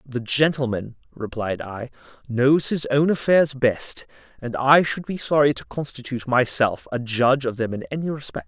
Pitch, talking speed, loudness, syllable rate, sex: 130 Hz, 170 wpm, -22 LUFS, 4.9 syllables/s, male